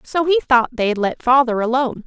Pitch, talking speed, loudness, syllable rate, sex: 255 Hz, 205 wpm, -17 LUFS, 5.5 syllables/s, female